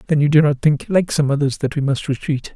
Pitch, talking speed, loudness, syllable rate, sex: 150 Hz, 280 wpm, -18 LUFS, 6.0 syllables/s, female